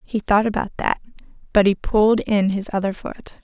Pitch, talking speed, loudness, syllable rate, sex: 205 Hz, 190 wpm, -20 LUFS, 5.0 syllables/s, female